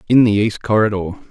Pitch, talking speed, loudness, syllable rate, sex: 115 Hz, 185 wpm, -16 LUFS, 6.3 syllables/s, male